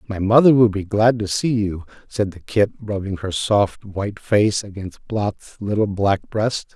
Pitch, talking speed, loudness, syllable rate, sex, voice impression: 105 Hz, 185 wpm, -19 LUFS, 4.2 syllables/s, male, masculine, middle-aged, slightly relaxed, slightly weak, slightly muffled, raspy, calm, mature, slightly friendly, wild, slightly lively, slightly kind